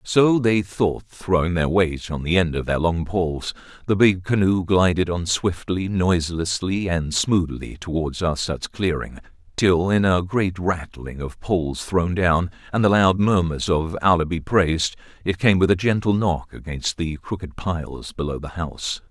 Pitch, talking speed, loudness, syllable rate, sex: 90 Hz, 175 wpm, -21 LUFS, 4.4 syllables/s, male